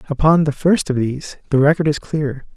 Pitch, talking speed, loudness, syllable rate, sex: 145 Hz, 210 wpm, -17 LUFS, 5.6 syllables/s, male